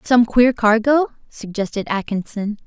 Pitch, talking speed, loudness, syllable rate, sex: 220 Hz, 115 wpm, -18 LUFS, 4.3 syllables/s, female